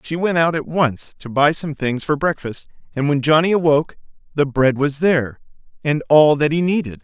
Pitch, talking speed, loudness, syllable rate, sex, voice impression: 150 Hz, 205 wpm, -18 LUFS, 5.2 syllables/s, male, masculine, adult-like, slightly middle-aged, thick, tensed, powerful, slightly bright, slightly hard, clear, fluent